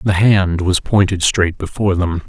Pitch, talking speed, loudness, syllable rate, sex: 95 Hz, 185 wpm, -15 LUFS, 4.7 syllables/s, male